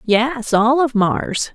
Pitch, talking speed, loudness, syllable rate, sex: 240 Hz, 155 wpm, -17 LUFS, 2.8 syllables/s, female